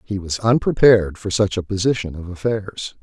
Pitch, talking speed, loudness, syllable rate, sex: 100 Hz, 180 wpm, -19 LUFS, 5.2 syllables/s, male